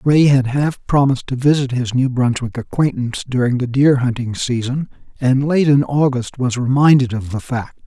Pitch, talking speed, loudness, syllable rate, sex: 130 Hz, 185 wpm, -17 LUFS, 5.0 syllables/s, male